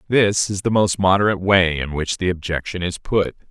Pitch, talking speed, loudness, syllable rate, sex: 95 Hz, 205 wpm, -19 LUFS, 5.4 syllables/s, male